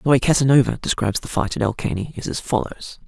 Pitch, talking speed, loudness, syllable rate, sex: 125 Hz, 235 wpm, -20 LUFS, 6.5 syllables/s, male